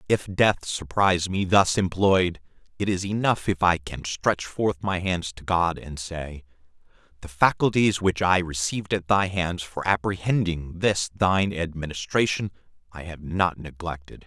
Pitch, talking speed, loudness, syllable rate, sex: 90 Hz, 155 wpm, -24 LUFS, 4.4 syllables/s, male